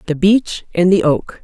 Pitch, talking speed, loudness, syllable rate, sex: 175 Hz, 210 wpm, -15 LUFS, 4.2 syllables/s, female